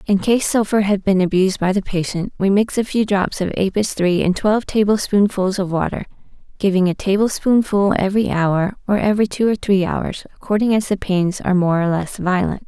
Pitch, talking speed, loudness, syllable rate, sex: 195 Hz, 200 wpm, -18 LUFS, 5.5 syllables/s, female